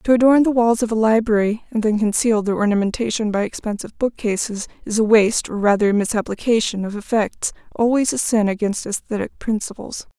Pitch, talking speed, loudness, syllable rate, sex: 220 Hz, 170 wpm, -19 LUFS, 5.8 syllables/s, female